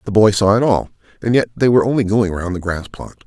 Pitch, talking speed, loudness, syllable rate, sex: 105 Hz, 275 wpm, -16 LUFS, 6.5 syllables/s, male